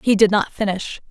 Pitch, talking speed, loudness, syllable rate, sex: 205 Hz, 220 wpm, -19 LUFS, 5.4 syllables/s, female